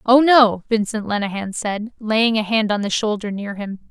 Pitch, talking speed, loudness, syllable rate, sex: 215 Hz, 200 wpm, -19 LUFS, 4.7 syllables/s, female